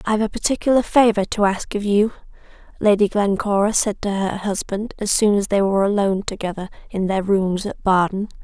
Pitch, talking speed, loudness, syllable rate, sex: 200 Hz, 185 wpm, -19 LUFS, 5.6 syllables/s, female